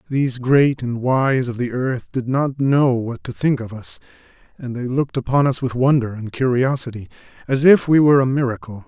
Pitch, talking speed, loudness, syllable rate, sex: 125 Hz, 205 wpm, -18 LUFS, 5.2 syllables/s, male